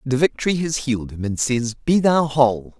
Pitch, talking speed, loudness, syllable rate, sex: 135 Hz, 195 wpm, -20 LUFS, 5.4 syllables/s, male